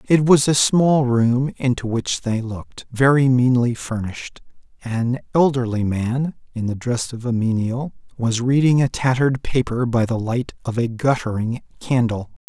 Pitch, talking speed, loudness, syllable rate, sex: 125 Hz, 160 wpm, -20 LUFS, 4.5 syllables/s, male